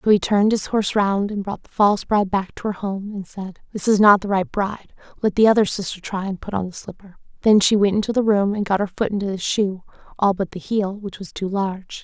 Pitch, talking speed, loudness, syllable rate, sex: 200 Hz, 270 wpm, -20 LUFS, 5.9 syllables/s, female